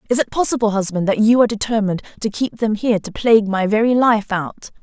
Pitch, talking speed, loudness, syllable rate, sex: 215 Hz, 225 wpm, -17 LUFS, 6.4 syllables/s, female